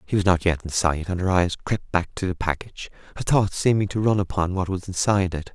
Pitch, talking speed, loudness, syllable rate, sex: 90 Hz, 260 wpm, -23 LUFS, 5.9 syllables/s, male